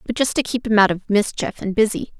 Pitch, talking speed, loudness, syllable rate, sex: 215 Hz, 275 wpm, -19 LUFS, 6.0 syllables/s, female